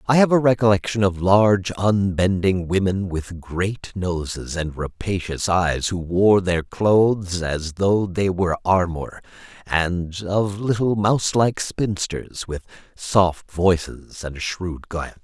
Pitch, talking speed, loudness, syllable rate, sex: 95 Hz, 140 wpm, -21 LUFS, 3.8 syllables/s, male